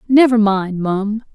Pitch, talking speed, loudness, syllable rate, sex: 215 Hz, 135 wpm, -16 LUFS, 3.6 syllables/s, female